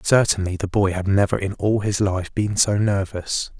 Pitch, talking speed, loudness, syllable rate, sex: 100 Hz, 200 wpm, -21 LUFS, 4.6 syllables/s, male